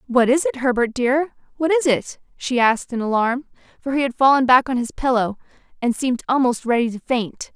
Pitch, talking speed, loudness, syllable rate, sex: 250 Hz, 205 wpm, -19 LUFS, 5.5 syllables/s, female